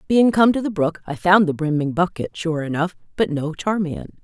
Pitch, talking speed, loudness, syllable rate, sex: 170 Hz, 210 wpm, -20 LUFS, 5.0 syllables/s, female